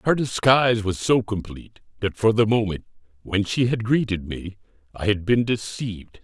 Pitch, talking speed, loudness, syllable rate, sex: 105 Hz, 175 wpm, -22 LUFS, 5.1 syllables/s, male